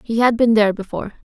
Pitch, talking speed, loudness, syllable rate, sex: 220 Hz, 230 wpm, -17 LUFS, 7.5 syllables/s, female